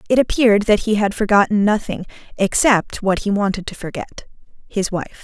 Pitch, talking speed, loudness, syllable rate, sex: 205 Hz, 160 wpm, -18 LUFS, 5.4 syllables/s, female